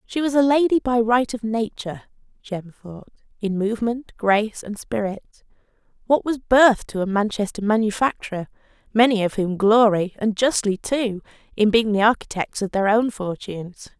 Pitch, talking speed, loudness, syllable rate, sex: 220 Hz, 160 wpm, -21 LUFS, 5.1 syllables/s, female